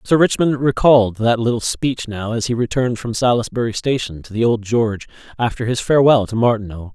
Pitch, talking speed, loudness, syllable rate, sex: 115 Hz, 190 wpm, -17 LUFS, 5.8 syllables/s, male